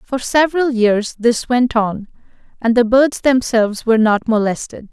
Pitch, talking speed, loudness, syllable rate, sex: 235 Hz, 160 wpm, -15 LUFS, 4.7 syllables/s, female